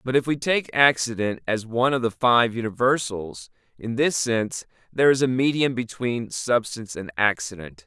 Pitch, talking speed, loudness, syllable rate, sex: 115 Hz, 170 wpm, -23 LUFS, 5.0 syllables/s, male